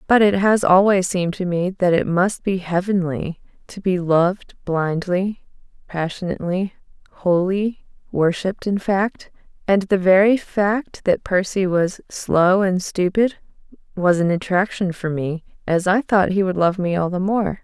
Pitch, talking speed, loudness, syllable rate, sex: 185 Hz, 155 wpm, -19 LUFS, 4.3 syllables/s, female